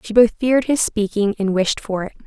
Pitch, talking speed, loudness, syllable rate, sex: 220 Hz, 240 wpm, -18 LUFS, 5.6 syllables/s, female